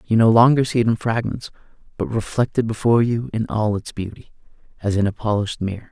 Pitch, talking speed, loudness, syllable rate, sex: 110 Hz, 205 wpm, -20 LUFS, 6.2 syllables/s, male